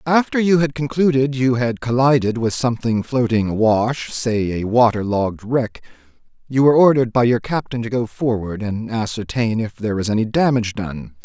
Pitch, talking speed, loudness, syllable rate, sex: 120 Hz, 175 wpm, -18 LUFS, 5.3 syllables/s, male